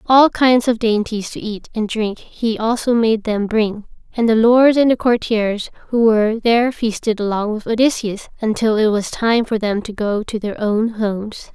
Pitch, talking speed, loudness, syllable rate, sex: 220 Hz, 200 wpm, -17 LUFS, 4.7 syllables/s, female